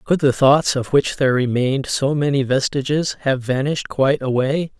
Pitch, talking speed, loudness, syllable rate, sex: 140 Hz, 175 wpm, -18 LUFS, 5.3 syllables/s, male